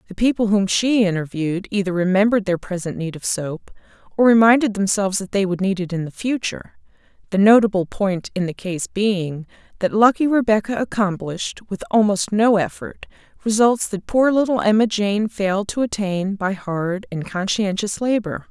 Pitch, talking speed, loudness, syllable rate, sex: 200 Hz, 170 wpm, -19 LUFS, 5.2 syllables/s, female